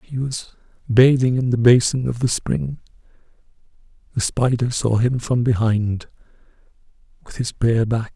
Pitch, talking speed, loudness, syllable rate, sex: 120 Hz, 130 wpm, -19 LUFS, 4.5 syllables/s, male